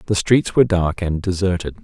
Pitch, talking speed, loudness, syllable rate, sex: 95 Hz, 195 wpm, -18 LUFS, 5.6 syllables/s, male